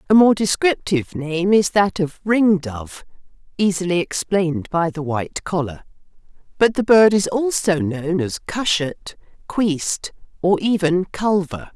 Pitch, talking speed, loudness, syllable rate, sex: 180 Hz, 135 wpm, -19 LUFS, 4.3 syllables/s, female